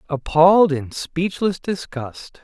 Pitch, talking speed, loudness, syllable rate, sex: 165 Hz, 100 wpm, -19 LUFS, 3.6 syllables/s, male